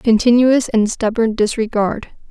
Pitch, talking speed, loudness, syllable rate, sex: 225 Hz, 105 wpm, -15 LUFS, 4.2 syllables/s, female